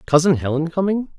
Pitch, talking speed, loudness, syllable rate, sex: 165 Hz, 150 wpm, -19 LUFS, 5.8 syllables/s, male